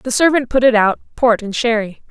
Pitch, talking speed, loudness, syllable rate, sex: 235 Hz, 230 wpm, -15 LUFS, 5.4 syllables/s, female